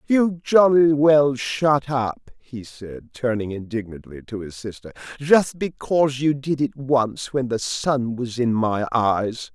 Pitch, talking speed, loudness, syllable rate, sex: 130 Hz, 155 wpm, -21 LUFS, 3.7 syllables/s, male